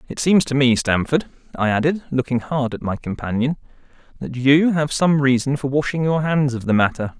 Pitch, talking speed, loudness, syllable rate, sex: 140 Hz, 200 wpm, -19 LUFS, 5.3 syllables/s, male